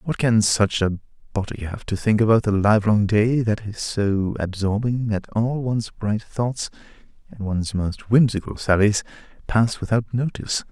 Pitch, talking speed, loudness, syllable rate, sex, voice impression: 110 Hz, 160 wpm, -21 LUFS, 4.7 syllables/s, male, masculine, very adult-like, slightly thick, slightly halting, sincere, slightly friendly